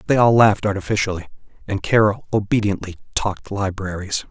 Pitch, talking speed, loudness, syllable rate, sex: 100 Hz, 125 wpm, -20 LUFS, 6.0 syllables/s, male